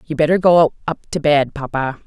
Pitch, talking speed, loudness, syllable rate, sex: 150 Hz, 205 wpm, -17 LUFS, 5.3 syllables/s, female